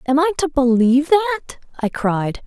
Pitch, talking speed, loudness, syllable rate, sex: 275 Hz, 170 wpm, -18 LUFS, 5.5 syllables/s, female